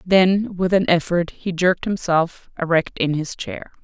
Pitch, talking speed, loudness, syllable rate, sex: 180 Hz, 170 wpm, -20 LUFS, 4.3 syllables/s, female